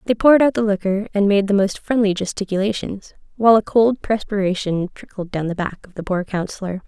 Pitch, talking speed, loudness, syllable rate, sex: 200 Hz, 200 wpm, -19 LUFS, 5.8 syllables/s, female